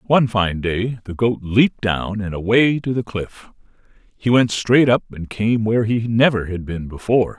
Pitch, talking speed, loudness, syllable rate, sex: 110 Hz, 195 wpm, -19 LUFS, 4.8 syllables/s, male